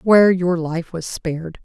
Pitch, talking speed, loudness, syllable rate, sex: 170 Hz, 185 wpm, -19 LUFS, 4.5 syllables/s, female